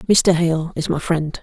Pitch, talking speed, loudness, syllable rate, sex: 165 Hz, 210 wpm, -19 LUFS, 3.7 syllables/s, female